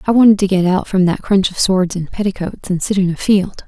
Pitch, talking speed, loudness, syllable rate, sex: 190 Hz, 275 wpm, -15 LUFS, 5.7 syllables/s, female